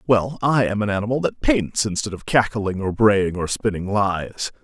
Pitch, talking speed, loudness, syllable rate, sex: 110 Hz, 195 wpm, -21 LUFS, 4.6 syllables/s, male